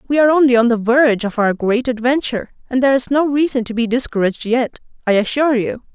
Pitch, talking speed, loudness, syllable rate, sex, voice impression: 245 Hz, 210 wpm, -16 LUFS, 6.4 syllables/s, female, feminine, adult-like, powerful, slightly bright, muffled, slightly raspy, intellectual, elegant, lively, slightly strict, slightly sharp